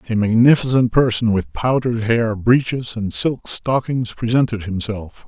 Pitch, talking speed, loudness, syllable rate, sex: 115 Hz, 135 wpm, -18 LUFS, 4.5 syllables/s, male